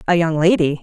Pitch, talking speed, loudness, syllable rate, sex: 165 Hz, 220 wpm, -16 LUFS, 6.0 syllables/s, female